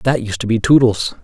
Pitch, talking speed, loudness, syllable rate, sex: 115 Hz, 245 wpm, -15 LUFS, 5.3 syllables/s, male